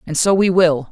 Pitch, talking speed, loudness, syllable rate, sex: 175 Hz, 260 wpm, -15 LUFS, 5.1 syllables/s, female